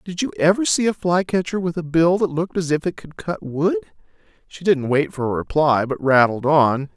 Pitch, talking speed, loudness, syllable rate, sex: 160 Hz, 225 wpm, -19 LUFS, 5.2 syllables/s, male